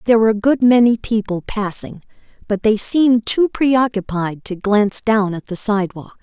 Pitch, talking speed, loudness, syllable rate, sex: 215 Hz, 175 wpm, -17 LUFS, 5.1 syllables/s, female